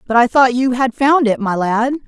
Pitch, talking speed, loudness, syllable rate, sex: 245 Hz, 260 wpm, -14 LUFS, 5.0 syllables/s, female